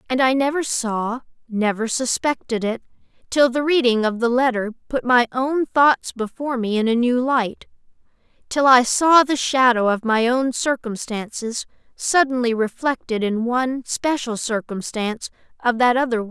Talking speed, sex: 155 wpm, female